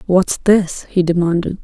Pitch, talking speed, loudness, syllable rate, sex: 180 Hz, 145 wpm, -16 LUFS, 4.3 syllables/s, female